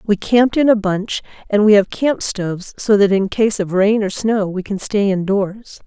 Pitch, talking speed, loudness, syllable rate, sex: 205 Hz, 225 wpm, -16 LUFS, 4.6 syllables/s, female